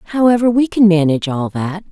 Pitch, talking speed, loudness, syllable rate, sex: 190 Hz, 190 wpm, -14 LUFS, 5.5 syllables/s, female